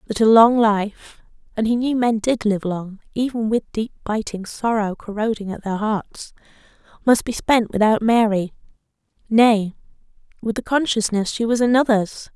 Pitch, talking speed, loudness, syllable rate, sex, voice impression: 220 Hz, 155 wpm, -19 LUFS, 3.2 syllables/s, female, very feminine, slightly adult-like, thin, tensed, powerful, bright, slightly hard, very clear, fluent, cute, slightly intellectual, refreshing, sincere, calm, friendly, reassuring, very unique, elegant, slightly wild, slightly sweet, lively, strict, slightly intense, sharp